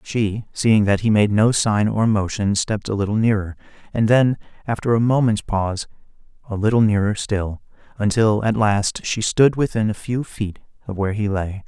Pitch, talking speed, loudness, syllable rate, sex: 105 Hz, 185 wpm, -20 LUFS, 5.0 syllables/s, male